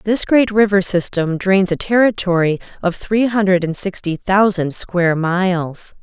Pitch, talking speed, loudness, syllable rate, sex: 190 Hz, 150 wpm, -16 LUFS, 4.4 syllables/s, female